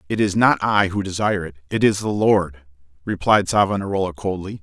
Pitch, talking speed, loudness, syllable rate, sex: 95 Hz, 180 wpm, -19 LUFS, 5.7 syllables/s, male